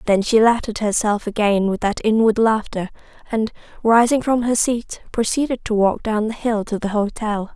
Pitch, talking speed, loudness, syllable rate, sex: 220 Hz, 190 wpm, -19 LUFS, 5.0 syllables/s, female